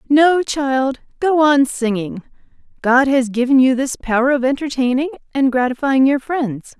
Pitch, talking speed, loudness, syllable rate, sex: 265 Hz, 150 wpm, -16 LUFS, 4.6 syllables/s, female